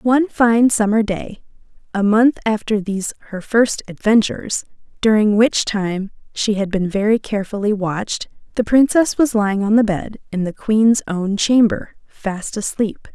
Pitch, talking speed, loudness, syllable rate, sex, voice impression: 215 Hz, 155 wpm, -18 LUFS, 4.6 syllables/s, female, feminine, adult-like, slightly relaxed, clear, fluent, raspy, intellectual, elegant, lively, slightly strict, slightly sharp